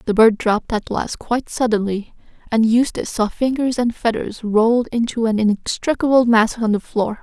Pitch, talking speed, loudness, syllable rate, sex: 230 Hz, 175 wpm, -18 LUFS, 5.2 syllables/s, female